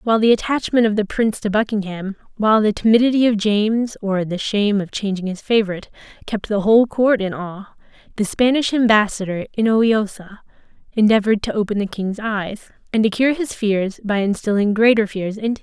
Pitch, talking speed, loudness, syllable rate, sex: 215 Hz, 180 wpm, -18 LUFS, 5.7 syllables/s, female